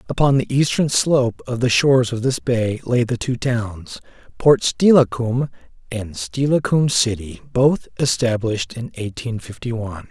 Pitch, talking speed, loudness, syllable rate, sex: 120 Hz, 150 wpm, -19 LUFS, 4.6 syllables/s, male